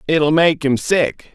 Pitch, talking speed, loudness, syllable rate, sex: 150 Hz, 180 wpm, -16 LUFS, 3.4 syllables/s, male